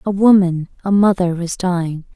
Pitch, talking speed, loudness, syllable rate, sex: 185 Hz, 165 wpm, -16 LUFS, 5.0 syllables/s, female